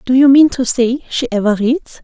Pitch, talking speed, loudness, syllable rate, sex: 250 Hz, 235 wpm, -13 LUFS, 4.8 syllables/s, female